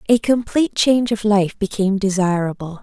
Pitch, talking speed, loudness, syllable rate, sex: 205 Hz, 150 wpm, -18 LUFS, 5.8 syllables/s, female